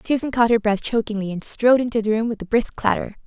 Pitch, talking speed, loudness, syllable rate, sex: 225 Hz, 255 wpm, -20 LUFS, 6.5 syllables/s, female